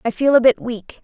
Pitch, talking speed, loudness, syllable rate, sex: 240 Hz, 290 wpm, -16 LUFS, 5.4 syllables/s, female